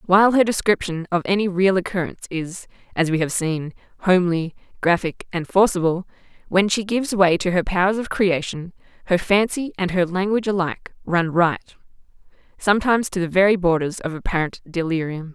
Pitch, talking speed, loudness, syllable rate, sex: 180 Hz, 160 wpm, -20 LUFS, 5.6 syllables/s, female